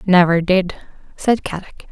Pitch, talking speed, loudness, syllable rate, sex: 185 Hz, 125 wpm, -17 LUFS, 5.2 syllables/s, female